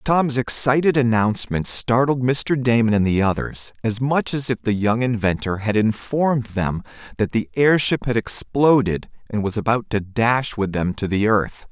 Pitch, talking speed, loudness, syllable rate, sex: 115 Hz, 175 wpm, -20 LUFS, 4.6 syllables/s, male